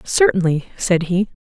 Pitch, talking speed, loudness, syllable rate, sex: 190 Hz, 125 wpm, -18 LUFS, 4.5 syllables/s, female